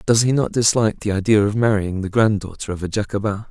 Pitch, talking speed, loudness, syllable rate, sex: 105 Hz, 220 wpm, -19 LUFS, 6.2 syllables/s, male